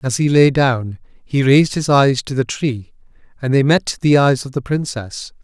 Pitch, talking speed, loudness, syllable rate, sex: 135 Hz, 210 wpm, -16 LUFS, 4.6 syllables/s, male